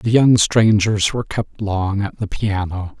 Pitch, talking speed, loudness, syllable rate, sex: 105 Hz, 180 wpm, -18 LUFS, 4.1 syllables/s, male